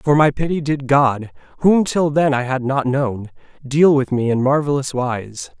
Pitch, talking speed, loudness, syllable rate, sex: 140 Hz, 195 wpm, -17 LUFS, 4.4 syllables/s, male